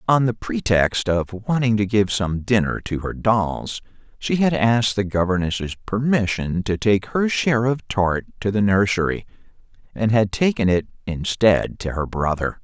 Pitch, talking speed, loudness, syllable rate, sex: 105 Hz, 165 wpm, -21 LUFS, 4.4 syllables/s, male